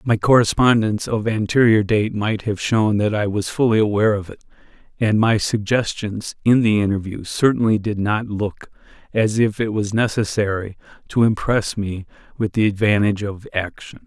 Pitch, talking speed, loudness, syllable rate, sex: 105 Hz, 160 wpm, -19 LUFS, 5.0 syllables/s, male